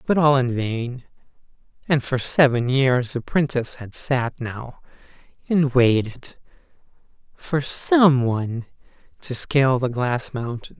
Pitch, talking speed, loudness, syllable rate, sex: 130 Hz, 130 wpm, -21 LUFS, 3.8 syllables/s, male